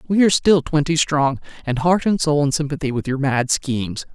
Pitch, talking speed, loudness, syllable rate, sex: 150 Hz, 215 wpm, -19 LUFS, 5.5 syllables/s, female